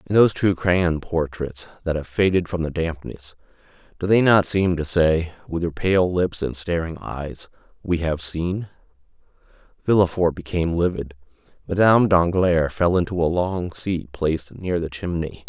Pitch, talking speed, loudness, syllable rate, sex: 85 Hz, 160 wpm, -21 LUFS, 4.6 syllables/s, male